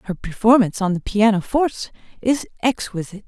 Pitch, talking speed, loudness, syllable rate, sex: 215 Hz, 130 wpm, -19 LUFS, 6.6 syllables/s, female